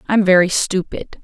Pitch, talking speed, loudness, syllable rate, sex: 190 Hz, 195 wpm, -15 LUFS, 5.7 syllables/s, female